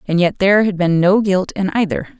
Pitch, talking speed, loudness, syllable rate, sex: 195 Hz, 245 wpm, -15 LUFS, 5.4 syllables/s, female